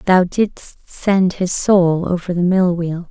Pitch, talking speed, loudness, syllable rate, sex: 180 Hz, 175 wpm, -16 LUFS, 3.4 syllables/s, female